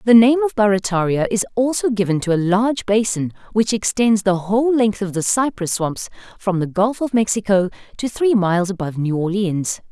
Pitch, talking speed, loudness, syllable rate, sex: 210 Hz, 190 wpm, -18 LUFS, 5.3 syllables/s, female